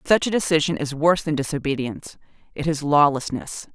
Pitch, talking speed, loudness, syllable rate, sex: 155 Hz, 145 wpm, -21 LUFS, 5.9 syllables/s, female